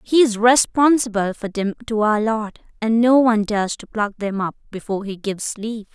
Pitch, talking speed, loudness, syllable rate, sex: 220 Hz, 200 wpm, -19 LUFS, 5.5 syllables/s, female